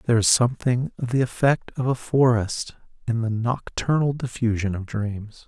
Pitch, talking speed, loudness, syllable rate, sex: 120 Hz, 165 wpm, -23 LUFS, 4.9 syllables/s, male